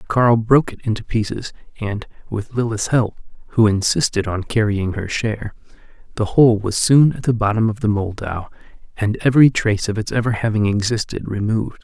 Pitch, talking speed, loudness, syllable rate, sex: 110 Hz, 170 wpm, -18 LUFS, 5.5 syllables/s, male